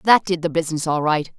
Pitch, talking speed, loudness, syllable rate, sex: 165 Hz, 260 wpm, -20 LUFS, 6.0 syllables/s, female